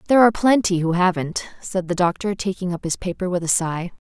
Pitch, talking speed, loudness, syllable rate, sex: 185 Hz, 220 wpm, -21 LUFS, 6.2 syllables/s, female